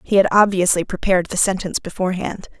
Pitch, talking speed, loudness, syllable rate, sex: 185 Hz, 160 wpm, -18 LUFS, 6.7 syllables/s, female